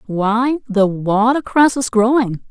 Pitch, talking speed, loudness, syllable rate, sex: 230 Hz, 120 wpm, -16 LUFS, 3.6 syllables/s, female